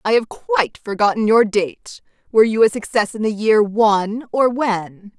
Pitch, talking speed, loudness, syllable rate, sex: 215 Hz, 185 wpm, -17 LUFS, 4.7 syllables/s, female